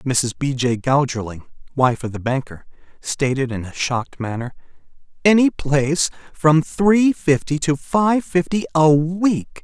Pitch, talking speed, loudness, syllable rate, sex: 145 Hz, 145 wpm, -19 LUFS, 4.2 syllables/s, male